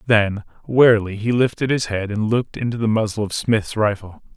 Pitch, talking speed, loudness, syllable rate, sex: 110 Hz, 195 wpm, -19 LUFS, 5.4 syllables/s, male